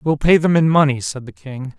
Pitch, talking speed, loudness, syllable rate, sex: 145 Hz, 235 wpm, -15 LUFS, 5.2 syllables/s, male